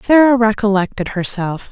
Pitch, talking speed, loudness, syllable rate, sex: 215 Hz, 105 wpm, -15 LUFS, 5.0 syllables/s, female